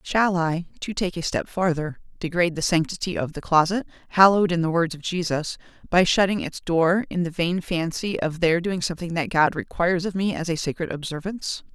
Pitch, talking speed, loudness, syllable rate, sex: 175 Hz, 205 wpm, -23 LUFS, 5.6 syllables/s, female